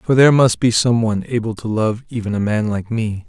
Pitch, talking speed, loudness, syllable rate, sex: 110 Hz, 255 wpm, -17 LUFS, 5.7 syllables/s, male